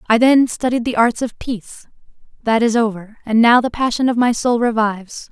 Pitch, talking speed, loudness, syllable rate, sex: 230 Hz, 205 wpm, -16 LUFS, 5.4 syllables/s, female